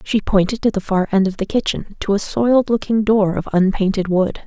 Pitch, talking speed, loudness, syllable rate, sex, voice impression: 200 Hz, 230 wpm, -18 LUFS, 5.4 syllables/s, female, very feminine, slightly young, adult-like, thin, tensed, slightly powerful, very bright, soft, very clear, fluent, cute, intellectual, very refreshing, sincere, calm, friendly, very reassuring, unique, very elegant, very sweet, slightly lively, very kind, modest, light